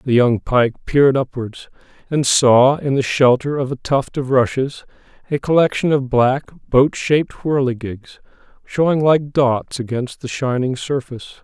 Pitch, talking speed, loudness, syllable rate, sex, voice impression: 135 Hz, 150 wpm, -17 LUFS, 4.3 syllables/s, male, masculine, middle-aged, slightly relaxed, powerful, slightly weak, slightly bright, soft, raspy, calm, mature, friendly, wild, lively, slightly strict, slightly intense